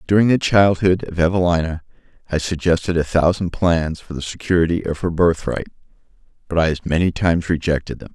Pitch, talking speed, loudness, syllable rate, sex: 85 Hz, 170 wpm, -19 LUFS, 5.8 syllables/s, male